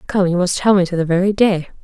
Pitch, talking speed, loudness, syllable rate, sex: 185 Hz, 295 wpm, -16 LUFS, 6.4 syllables/s, female